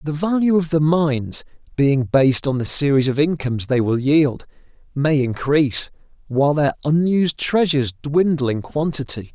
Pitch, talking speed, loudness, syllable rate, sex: 145 Hz, 155 wpm, -19 LUFS, 5.1 syllables/s, male